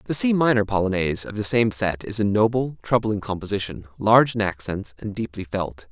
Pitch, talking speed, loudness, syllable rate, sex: 105 Hz, 195 wpm, -22 LUFS, 5.6 syllables/s, male